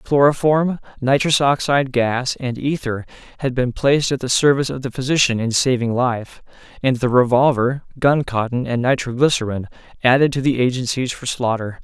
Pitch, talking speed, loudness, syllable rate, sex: 130 Hz, 150 wpm, -18 LUFS, 5.3 syllables/s, male